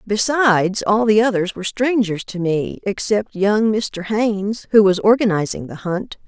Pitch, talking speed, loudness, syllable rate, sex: 205 Hz, 160 wpm, -18 LUFS, 4.5 syllables/s, female